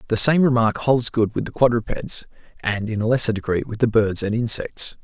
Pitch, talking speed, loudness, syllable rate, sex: 115 Hz, 215 wpm, -20 LUFS, 5.4 syllables/s, male